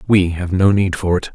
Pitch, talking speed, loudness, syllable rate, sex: 95 Hz, 270 wpm, -16 LUFS, 5.1 syllables/s, male